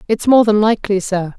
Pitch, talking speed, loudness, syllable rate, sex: 205 Hz, 215 wpm, -14 LUFS, 5.9 syllables/s, female